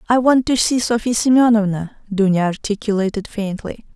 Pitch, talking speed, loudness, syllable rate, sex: 215 Hz, 135 wpm, -17 LUFS, 5.3 syllables/s, female